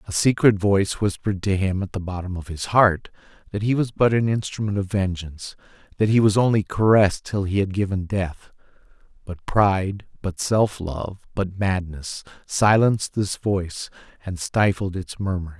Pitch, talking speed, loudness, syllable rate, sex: 95 Hz, 170 wpm, -22 LUFS, 5.0 syllables/s, male